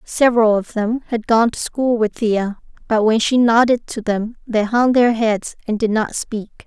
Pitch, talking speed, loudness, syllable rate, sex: 225 Hz, 205 wpm, -17 LUFS, 4.3 syllables/s, female